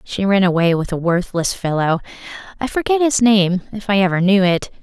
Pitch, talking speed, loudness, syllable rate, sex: 195 Hz, 185 wpm, -17 LUFS, 5.3 syllables/s, female